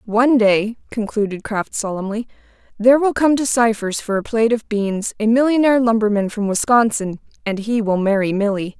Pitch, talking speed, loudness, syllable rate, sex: 220 Hz, 170 wpm, -18 LUFS, 5.4 syllables/s, female